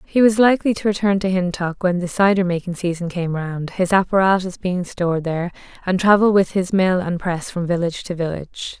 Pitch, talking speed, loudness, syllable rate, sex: 185 Hz, 205 wpm, -19 LUFS, 5.6 syllables/s, female